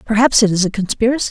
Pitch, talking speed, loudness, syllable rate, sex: 215 Hz, 230 wpm, -15 LUFS, 7.6 syllables/s, female